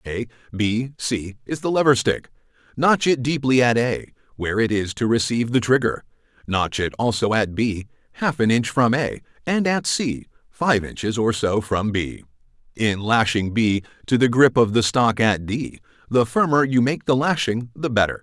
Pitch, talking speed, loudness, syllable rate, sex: 120 Hz, 190 wpm, -21 LUFS, 4.7 syllables/s, male